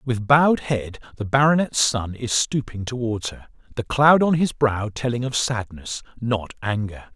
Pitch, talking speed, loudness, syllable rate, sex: 120 Hz, 160 wpm, -21 LUFS, 4.4 syllables/s, male